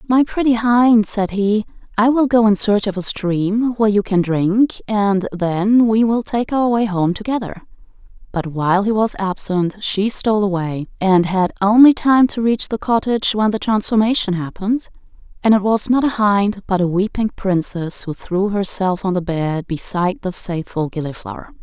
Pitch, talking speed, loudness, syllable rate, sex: 205 Hz, 185 wpm, -17 LUFS, 4.7 syllables/s, female